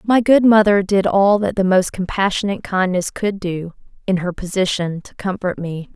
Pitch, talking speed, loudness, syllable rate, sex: 190 Hz, 180 wpm, -17 LUFS, 4.6 syllables/s, female